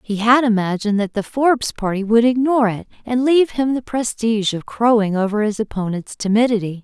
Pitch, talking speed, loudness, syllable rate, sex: 225 Hz, 185 wpm, -18 LUFS, 5.8 syllables/s, female